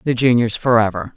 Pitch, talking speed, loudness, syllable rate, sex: 115 Hz, 155 wpm, -16 LUFS, 5.8 syllables/s, female